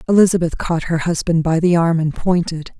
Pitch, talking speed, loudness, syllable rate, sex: 170 Hz, 195 wpm, -17 LUFS, 5.4 syllables/s, female